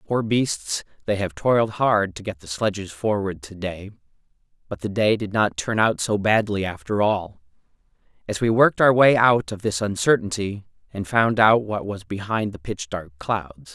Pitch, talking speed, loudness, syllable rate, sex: 100 Hz, 190 wpm, -22 LUFS, 4.6 syllables/s, male